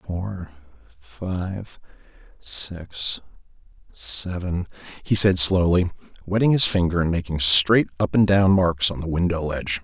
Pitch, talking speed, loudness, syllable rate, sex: 90 Hz, 130 wpm, -21 LUFS, 4.0 syllables/s, male